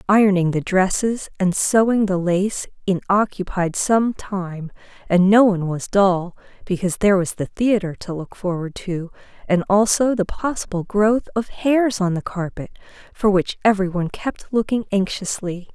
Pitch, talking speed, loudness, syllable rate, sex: 195 Hz, 160 wpm, -20 LUFS, 4.7 syllables/s, female